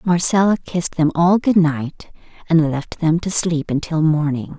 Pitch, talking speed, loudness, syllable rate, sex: 165 Hz, 170 wpm, -18 LUFS, 4.4 syllables/s, female